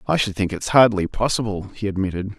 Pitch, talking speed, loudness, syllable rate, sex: 100 Hz, 200 wpm, -20 LUFS, 5.9 syllables/s, male